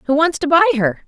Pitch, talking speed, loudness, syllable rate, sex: 295 Hz, 280 wpm, -15 LUFS, 6.9 syllables/s, female